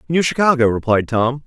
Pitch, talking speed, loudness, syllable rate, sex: 130 Hz, 165 wpm, -16 LUFS, 5.4 syllables/s, male